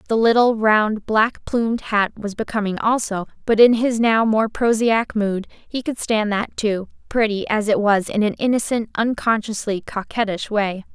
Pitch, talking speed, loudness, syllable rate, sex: 215 Hz, 170 wpm, -19 LUFS, 4.5 syllables/s, female